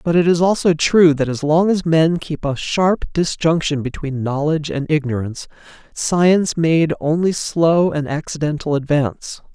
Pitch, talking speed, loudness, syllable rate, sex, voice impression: 155 Hz, 155 wpm, -17 LUFS, 4.7 syllables/s, male, masculine, adult-like, slightly muffled, slightly cool, slightly refreshing, slightly sincere, slightly kind